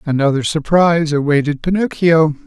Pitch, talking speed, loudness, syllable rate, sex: 155 Hz, 95 wpm, -15 LUFS, 5.2 syllables/s, male